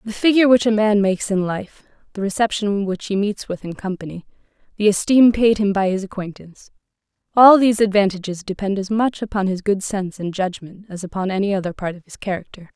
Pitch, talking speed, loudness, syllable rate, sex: 200 Hz, 200 wpm, -19 LUFS, 6.1 syllables/s, female